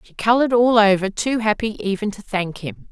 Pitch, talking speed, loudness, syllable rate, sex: 210 Hz, 205 wpm, -19 LUFS, 5.3 syllables/s, female